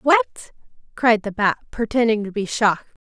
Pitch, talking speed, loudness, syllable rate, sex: 220 Hz, 155 wpm, -20 LUFS, 4.7 syllables/s, female